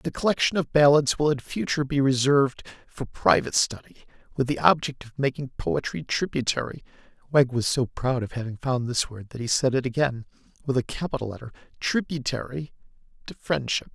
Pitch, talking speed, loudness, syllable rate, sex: 130 Hz, 165 wpm, -25 LUFS, 5.7 syllables/s, male